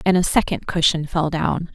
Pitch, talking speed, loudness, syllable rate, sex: 165 Hz, 205 wpm, -20 LUFS, 4.9 syllables/s, female